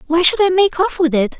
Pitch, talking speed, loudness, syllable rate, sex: 340 Hz, 300 wpm, -15 LUFS, 5.7 syllables/s, female